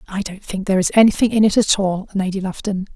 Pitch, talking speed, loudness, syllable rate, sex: 195 Hz, 245 wpm, -18 LUFS, 6.3 syllables/s, female